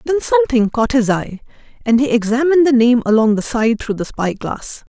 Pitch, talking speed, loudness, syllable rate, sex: 245 Hz, 195 wpm, -15 LUFS, 5.3 syllables/s, female